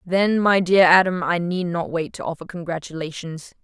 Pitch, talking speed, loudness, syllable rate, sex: 175 Hz, 180 wpm, -20 LUFS, 5.0 syllables/s, female